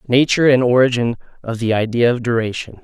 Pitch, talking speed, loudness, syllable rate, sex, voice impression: 120 Hz, 170 wpm, -16 LUFS, 6.1 syllables/s, male, very masculine, very adult-like, thick, slightly tensed, slightly weak, slightly dark, soft, clear, slightly fluent, cool, intellectual, refreshing, slightly sincere, calm, friendly, reassuring, slightly unique, slightly elegant, slightly wild, sweet, slightly lively, kind, very modest